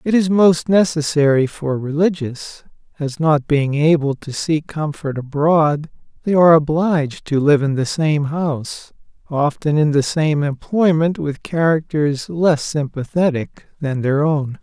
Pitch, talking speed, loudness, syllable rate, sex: 155 Hz, 145 wpm, -17 LUFS, 4.1 syllables/s, male